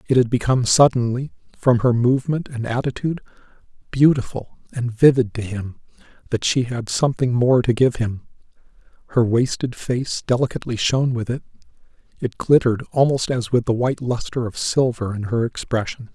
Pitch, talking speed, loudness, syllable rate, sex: 125 Hz, 150 wpm, -20 LUFS, 5.5 syllables/s, male